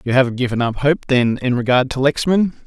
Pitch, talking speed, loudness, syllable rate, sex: 130 Hz, 225 wpm, -17 LUFS, 5.7 syllables/s, male